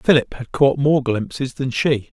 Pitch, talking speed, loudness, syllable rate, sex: 130 Hz, 190 wpm, -19 LUFS, 4.3 syllables/s, male